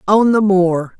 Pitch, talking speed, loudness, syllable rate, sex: 195 Hz, 180 wpm, -14 LUFS, 3.6 syllables/s, female